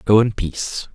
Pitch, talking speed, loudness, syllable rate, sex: 100 Hz, 190 wpm, -20 LUFS, 4.9 syllables/s, male